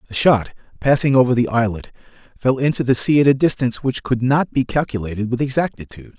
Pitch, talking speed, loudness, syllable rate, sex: 125 Hz, 195 wpm, -18 LUFS, 6.3 syllables/s, male